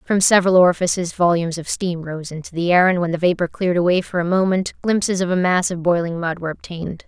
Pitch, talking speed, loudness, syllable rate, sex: 175 Hz, 235 wpm, -19 LUFS, 6.5 syllables/s, female